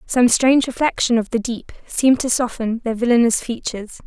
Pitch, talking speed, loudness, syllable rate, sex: 240 Hz, 175 wpm, -18 LUFS, 5.6 syllables/s, female